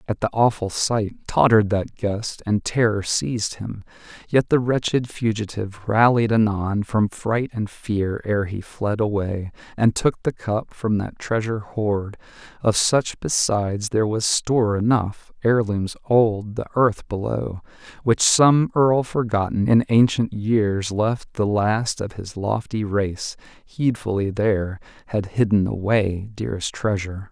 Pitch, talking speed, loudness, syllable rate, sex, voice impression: 110 Hz, 145 wpm, -21 LUFS, 4.1 syllables/s, male, masculine, adult-like, tensed, slightly powerful, slightly dark, slightly muffled, cool, intellectual, sincere, slightly mature, friendly, reassuring, wild, lively, slightly kind, modest